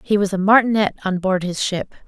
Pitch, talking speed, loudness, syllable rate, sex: 195 Hz, 230 wpm, -18 LUFS, 5.7 syllables/s, female